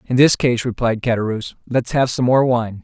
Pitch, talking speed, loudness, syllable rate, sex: 120 Hz, 210 wpm, -18 LUFS, 5.4 syllables/s, male